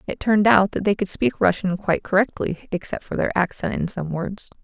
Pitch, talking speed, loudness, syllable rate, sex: 190 Hz, 220 wpm, -21 LUFS, 5.5 syllables/s, female